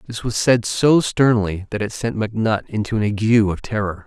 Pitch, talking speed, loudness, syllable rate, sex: 110 Hz, 205 wpm, -19 LUFS, 5.3 syllables/s, male